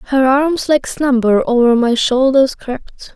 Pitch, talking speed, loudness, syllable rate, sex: 260 Hz, 150 wpm, -13 LUFS, 3.6 syllables/s, female